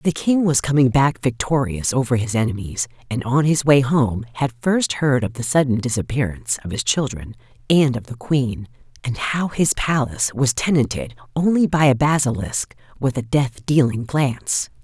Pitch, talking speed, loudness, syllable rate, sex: 130 Hz, 175 wpm, -20 LUFS, 4.9 syllables/s, female